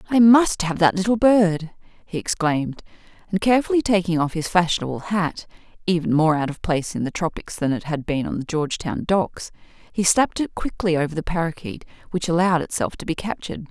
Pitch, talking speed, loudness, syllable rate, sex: 175 Hz, 185 wpm, -21 LUFS, 5.8 syllables/s, female